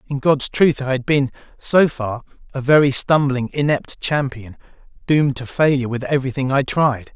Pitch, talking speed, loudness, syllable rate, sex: 135 Hz, 170 wpm, -18 LUFS, 5.1 syllables/s, male